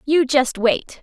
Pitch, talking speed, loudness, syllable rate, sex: 265 Hz, 175 wpm, -18 LUFS, 3.4 syllables/s, female